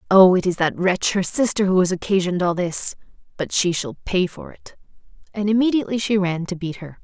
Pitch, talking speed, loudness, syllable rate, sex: 190 Hz, 215 wpm, -20 LUFS, 5.7 syllables/s, female